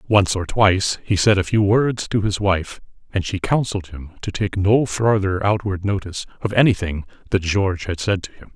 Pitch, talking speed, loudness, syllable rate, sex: 100 Hz, 205 wpm, -20 LUFS, 5.2 syllables/s, male